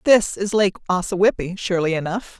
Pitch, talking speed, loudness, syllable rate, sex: 190 Hz, 150 wpm, -20 LUFS, 5.8 syllables/s, female